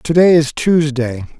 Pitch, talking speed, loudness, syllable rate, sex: 150 Hz, 170 wpm, -14 LUFS, 4.1 syllables/s, male